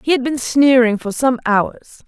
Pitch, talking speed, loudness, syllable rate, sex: 250 Hz, 205 wpm, -16 LUFS, 4.3 syllables/s, female